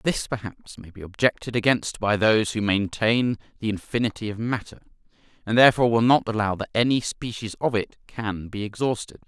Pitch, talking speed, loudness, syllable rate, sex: 110 Hz, 175 wpm, -23 LUFS, 5.6 syllables/s, male